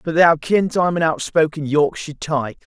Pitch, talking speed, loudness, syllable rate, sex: 160 Hz, 175 wpm, -18 LUFS, 5.0 syllables/s, male